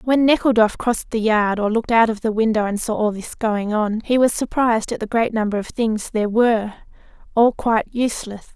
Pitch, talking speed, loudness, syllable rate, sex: 220 Hz, 215 wpm, -19 LUFS, 5.7 syllables/s, female